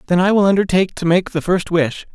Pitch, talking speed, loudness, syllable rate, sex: 180 Hz, 250 wpm, -16 LUFS, 6.4 syllables/s, male